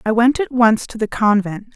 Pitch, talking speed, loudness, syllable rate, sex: 225 Hz, 240 wpm, -16 LUFS, 4.9 syllables/s, female